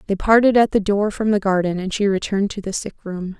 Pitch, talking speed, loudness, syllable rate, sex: 200 Hz, 265 wpm, -19 LUFS, 6.1 syllables/s, female